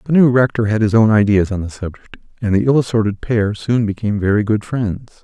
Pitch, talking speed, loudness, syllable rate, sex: 110 Hz, 240 wpm, -16 LUFS, 5.9 syllables/s, male